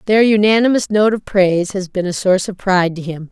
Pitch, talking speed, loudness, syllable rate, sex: 195 Hz, 235 wpm, -15 LUFS, 6.0 syllables/s, female